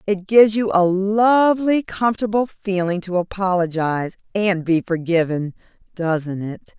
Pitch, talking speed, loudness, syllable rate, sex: 190 Hz, 125 wpm, -19 LUFS, 4.6 syllables/s, female